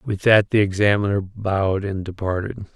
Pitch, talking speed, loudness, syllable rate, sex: 100 Hz, 155 wpm, -20 LUFS, 5.0 syllables/s, male